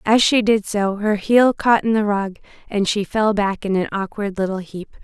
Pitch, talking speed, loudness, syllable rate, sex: 205 Hz, 225 wpm, -19 LUFS, 4.7 syllables/s, female